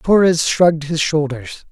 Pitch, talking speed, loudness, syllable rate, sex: 155 Hz, 140 wpm, -16 LUFS, 4.2 syllables/s, male